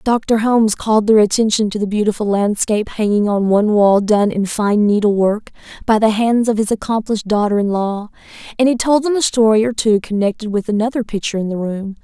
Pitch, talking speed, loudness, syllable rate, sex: 215 Hz, 205 wpm, -16 LUFS, 5.8 syllables/s, female